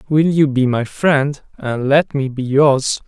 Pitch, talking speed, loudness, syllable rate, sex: 140 Hz, 195 wpm, -16 LUFS, 3.6 syllables/s, male